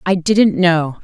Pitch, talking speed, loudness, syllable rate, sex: 175 Hz, 175 wpm, -14 LUFS, 3.2 syllables/s, female